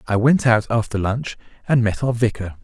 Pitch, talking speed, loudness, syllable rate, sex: 115 Hz, 205 wpm, -19 LUFS, 5.2 syllables/s, male